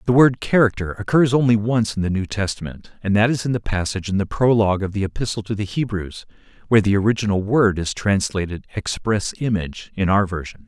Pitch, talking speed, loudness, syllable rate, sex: 105 Hz, 200 wpm, -20 LUFS, 6.0 syllables/s, male